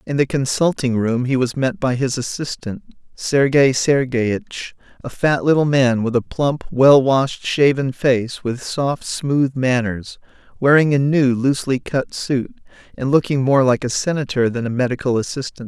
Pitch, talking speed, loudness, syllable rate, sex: 130 Hz, 160 wpm, -18 LUFS, 4.5 syllables/s, male